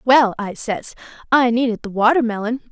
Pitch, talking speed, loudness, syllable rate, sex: 235 Hz, 155 wpm, -18 LUFS, 5.1 syllables/s, female